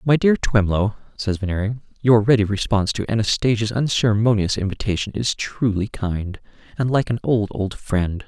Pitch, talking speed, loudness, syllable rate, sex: 110 Hz, 150 wpm, -20 LUFS, 5.2 syllables/s, male